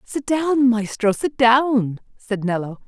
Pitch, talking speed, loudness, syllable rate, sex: 235 Hz, 145 wpm, -19 LUFS, 3.7 syllables/s, female